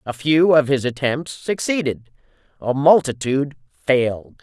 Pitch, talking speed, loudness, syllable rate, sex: 140 Hz, 110 wpm, -19 LUFS, 4.4 syllables/s, male